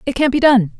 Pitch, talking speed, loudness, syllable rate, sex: 240 Hz, 305 wpm, -14 LUFS, 6.3 syllables/s, female